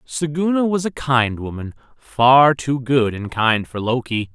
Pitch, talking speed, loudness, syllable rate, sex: 130 Hz, 165 wpm, -18 LUFS, 4.1 syllables/s, male